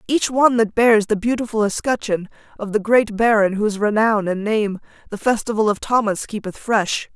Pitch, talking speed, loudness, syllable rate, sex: 215 Hz, 175 wpm, -19 LUFS, 5.2 syllables/s, female